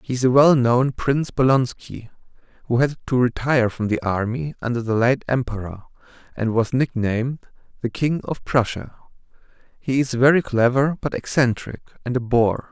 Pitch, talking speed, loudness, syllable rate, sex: 125 Hz, 155 wpm, -20 LUFS, 5.1 syllables/s, male